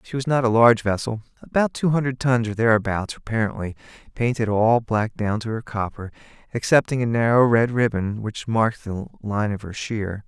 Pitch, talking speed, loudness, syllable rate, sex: 115 Hz, 185 wpm, -22 LUFS, 5.4 syllables/s, male